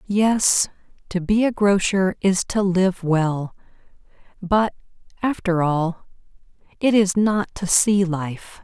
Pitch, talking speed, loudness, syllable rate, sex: 190 Hz, 125 wpm, -20 LUFS, 3.4 syllables/s, female